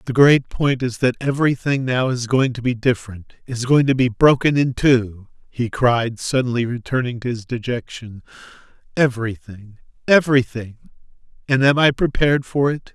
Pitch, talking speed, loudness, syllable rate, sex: 125 Hz, 160 wpm, -18 LUFS, 5.0 syllables/s, male